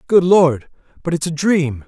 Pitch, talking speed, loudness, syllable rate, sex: 160 Hz, 190 wpm, -16 LUFS, 4.3 syllables/s, male